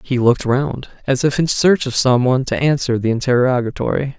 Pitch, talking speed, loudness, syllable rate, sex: 130 Hz, 200 wpm, -17 LUFS, 5.5 syllables/s, male